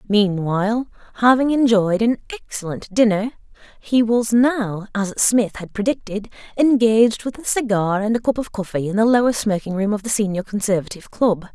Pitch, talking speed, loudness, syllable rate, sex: 215 Hz, 170 wpm, -19 LUFS, 5.3 syllables/s, female